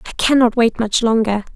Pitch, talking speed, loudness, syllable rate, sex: 225 Hz, 190 wpm, -16 LUFS, 5.6 syllables/s, female